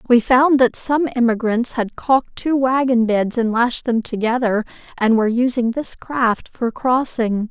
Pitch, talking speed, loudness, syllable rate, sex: 240 Hz, 170 wpm, -18 LUFS, 4.3 syllables/s, female